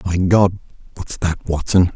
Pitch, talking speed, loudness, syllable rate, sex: 90 Hz, 155 wpm, -18 LUFS, 4.4 syllables/s, male